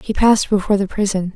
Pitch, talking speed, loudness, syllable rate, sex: 200 Hz, 220 wpm, -17 LUFS, 6.9 syllables/s, female